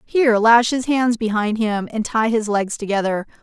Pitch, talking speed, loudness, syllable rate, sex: 225 Hz, 195 wpm, -18 LUFS, 4.7 syllables/s, female